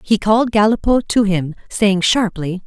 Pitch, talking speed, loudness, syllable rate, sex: 205 Hz, 160 wpm, -16 LUFS, 4.7 syllables/s, female